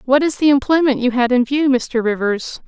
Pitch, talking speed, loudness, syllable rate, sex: 260 Hz, 225 wpm, -16 LUFS, 5.2 syllables/s, female